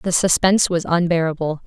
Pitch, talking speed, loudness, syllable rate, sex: 170 Hz, 145 wpm, -18 LUFS, 5.7 syllables/s, female